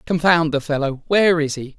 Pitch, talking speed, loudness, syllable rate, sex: 155 Hz, 200 wpm, -18 LUFS, 5.6 syllables/s, male